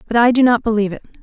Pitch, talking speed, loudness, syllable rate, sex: 230 Hz, 295 wpm, -15 LUFS, 8.9 syllables/s, female